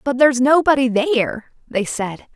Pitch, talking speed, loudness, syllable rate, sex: 255 Hz, 155 wpm, -17 LUFS, 6.3 syllables/s, female